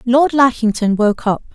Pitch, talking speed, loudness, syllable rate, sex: 240 Hz, 155 wpm, -15 LUFS, 4.4 syllables/s, female